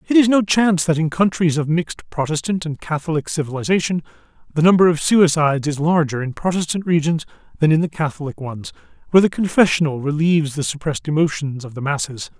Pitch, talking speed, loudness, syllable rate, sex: 160 Hz, 180 wpm, -18 LUFS, 6.2 syllables/s, male